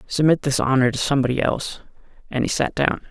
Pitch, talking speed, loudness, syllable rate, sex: 135 Hz, 195 wpm, -21 LUFS, 6.6 syllables/s, male